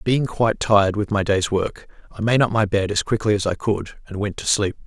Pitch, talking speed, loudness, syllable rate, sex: 105 Hz, 260 wpm, -20 LUFS, 5.7 syllables/s, male